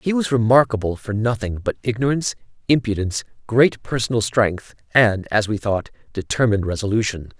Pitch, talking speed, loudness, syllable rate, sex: 110 Hz, 140 wpm, -20 LUFS, 5.7 syllables/s, male